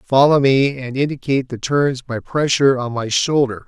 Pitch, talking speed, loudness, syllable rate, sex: 130 Hz, 180 wpm, -17 LUFS, 5.0 syllables/s, male